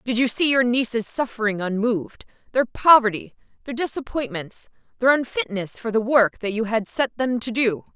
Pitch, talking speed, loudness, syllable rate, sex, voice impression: 235 Hz, 165 wpm, -21 LUFS, 5.1 syllables/s, female, feminine, slightly adult-like, tensed, clear, slightly intellectual, slightly friendly, lively